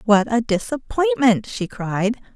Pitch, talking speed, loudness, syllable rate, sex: 220 Hz, 130 wpm, -20 LUFS, 3.8 syllables/s, female